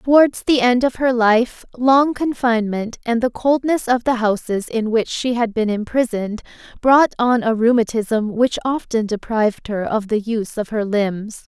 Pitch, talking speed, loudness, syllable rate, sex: 230 Hz, 175 wpm, -18 LUFS, 4.6 syllables/s, female